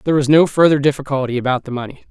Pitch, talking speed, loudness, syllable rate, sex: 140 Hz, 230 wpm, -16 LUFS, 7.7 syllables/s, male